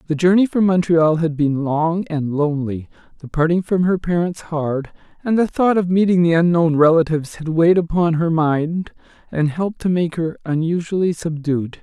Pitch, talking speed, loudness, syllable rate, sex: 165 Hz, 180 wpm, -18 LUFS, 5.0 syllables/s, male